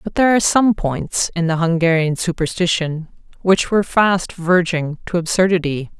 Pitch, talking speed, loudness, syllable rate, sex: 175 Hz, 150 wpm, -17 LUFS, 5.0 syllables/s, female